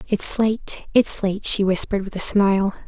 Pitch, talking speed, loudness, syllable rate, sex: 200 Hz, 190 wpm, -19 LUFS, 4.8 syllables/s, female